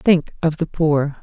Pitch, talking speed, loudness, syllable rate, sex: 155 Hz, 195 wpm, -19 LUFS, 3.7 syllables/s, female